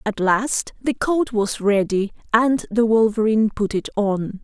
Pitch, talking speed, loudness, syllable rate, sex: 220 Hz, 160 wpm, -20 LUFS, 4.1 syllables/s, female